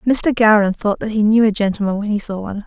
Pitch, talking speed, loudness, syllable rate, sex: 210 Hz, 270 wpm, -16 LUFS, 6.4 syllables/s, female